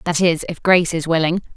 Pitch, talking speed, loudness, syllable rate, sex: 165 Hz, 230 wpm, -17 LUFS, 6.3 syllables/s, female